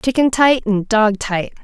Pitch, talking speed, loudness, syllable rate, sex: 225 Hz, 185 wpm, -16 LUFS, 4.0 syllables/s, female